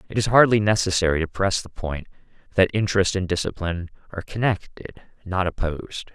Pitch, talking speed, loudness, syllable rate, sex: 95 Hz, 155 wpm, -22 LUFS, 6.0 syllables/s, male